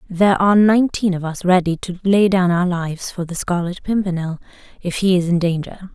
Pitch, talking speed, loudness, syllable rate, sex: 180 Hz, 200 wpm, -18 LUFS, 5.7 syllables/s, female